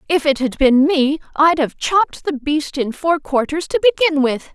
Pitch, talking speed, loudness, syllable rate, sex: 300 Hz, 210 wpm, -17 LUFS, 4.9 syllables/s, female